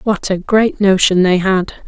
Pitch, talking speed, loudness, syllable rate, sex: 195 Hz, 190 wpm, -13 LUFS, 4.0 syllables/s, female